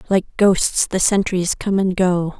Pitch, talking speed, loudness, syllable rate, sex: 185 Hz, 175 wpm, -18 LUFS, 3.8 syllables/s, female